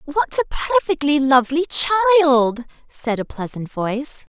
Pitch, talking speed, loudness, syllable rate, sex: 285 Hz, 125 wpm, -18 LUFS, 4.6 syllables/s, female